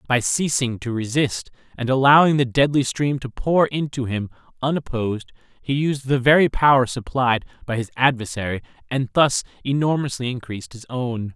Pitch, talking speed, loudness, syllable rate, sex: 130 Hz, 155 wpm, -21 LUFS, 5.2 syllables/s, male